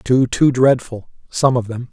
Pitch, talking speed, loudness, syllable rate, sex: 125 Hz, 155 wpm, -16 LUFS, 4.1 syllables/s, male